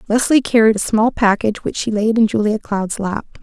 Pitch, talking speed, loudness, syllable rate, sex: 215 Hz, 210 wpm, -16 LUFS, 5.5 syllables/s, female